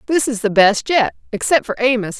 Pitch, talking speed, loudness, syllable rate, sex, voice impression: 235 Hz, 190 wpm, -16 LUFS, 5.5 syllables/s, female, very feminine, very adult-like, middle-aged, very thin, tensed, slightly powerful, bright, very hard, very clear, very fluent, cool, slightly intellectual, slightly refreshing, sincere, slightly calm, slightly friendly, slightly reassuring, unique, slightly elegant, wild, slightly sweet, kind, very modest